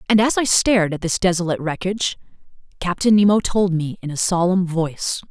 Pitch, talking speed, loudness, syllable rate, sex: 185 Hz, 180 wpm, -19 LUFS, 5.9 syllables/s, female